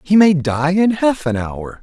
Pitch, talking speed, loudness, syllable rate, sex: 165 Hz, 230 wpm, -16 LUFS, 4.1 syllables/s, male